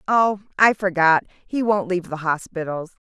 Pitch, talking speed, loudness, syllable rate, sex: 185 Hz, 155 wpm, -21 LUFS, 4.8 syllables/s, female